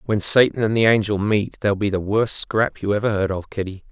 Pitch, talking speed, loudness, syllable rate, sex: 105 Hz, 245 wpm, -20 LUFS, 5.7 syllables/s, male